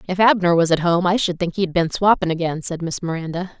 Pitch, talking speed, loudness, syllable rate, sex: 175 Hz, 250 wpm, -19 LUFS, 5.9 syllables/s, female